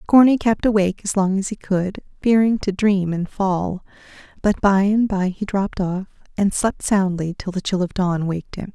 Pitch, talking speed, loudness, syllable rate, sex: 195 Hz, 205 wpm, -20 LUFS, 4.9 syllables/s, female